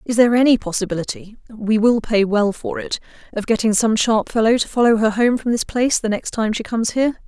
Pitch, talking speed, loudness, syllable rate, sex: 225 Hz, 230 wpm, -18 LUFS, 5.6 syllables/s, female